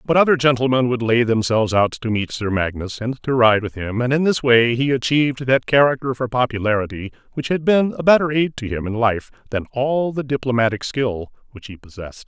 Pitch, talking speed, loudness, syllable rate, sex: 125 Hz, 215 wpm, -19 LUFS, 5.6 syllables/s, male